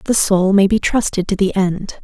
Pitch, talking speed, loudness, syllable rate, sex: 195 Hz, 235 wpm, -15 LUFS, 4.5 syllables/s, female